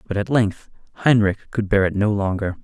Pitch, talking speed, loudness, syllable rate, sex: 105 Hz, 205 wpm, -20 LUFS, 5.5 syllables/s, male